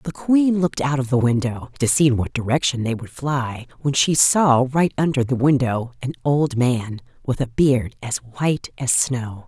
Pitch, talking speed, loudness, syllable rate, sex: 130 Hz, 205 wpm, -20 LUFS, 4.6 syllables/s, female